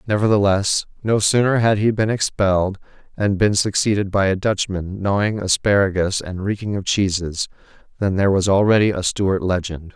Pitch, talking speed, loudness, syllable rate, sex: 100 Hz, 155 wpm, -19 LUFS, 5.1 syllables/s, male